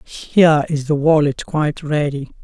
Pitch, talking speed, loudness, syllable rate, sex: 150 Hz, 150 wpm, -17 LUFS, 4.6 syllables/s, male